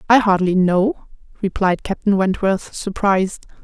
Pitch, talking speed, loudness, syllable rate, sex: 195 Hz, 115 wpm, -18 LUFS, 4.4 syllables/s, female